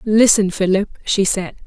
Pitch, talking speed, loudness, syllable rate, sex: 200 Hz, 145 wpm, -16 LUFS, 4.5 syllables/s, female